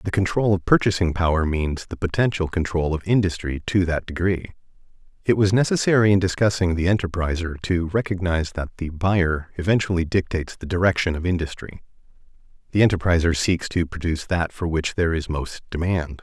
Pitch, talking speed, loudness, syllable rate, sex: 90 Hz, 165 wpm, -22 LUFS, 5.7 syllables/s, male